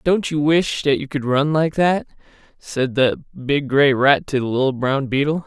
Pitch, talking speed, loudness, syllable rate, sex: 140 Hz, 210 wpm, -19 LUFS, 4.4 syllables/s, male